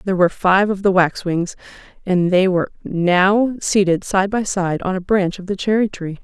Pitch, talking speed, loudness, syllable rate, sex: 190 Hz, 200 wpm, -18 LUFS, 4.9 syllables/s, female